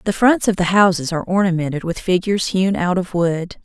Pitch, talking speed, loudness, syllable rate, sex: 185 Hz, 215 wpm, -18 LUFS, 5.7 syllables/s, female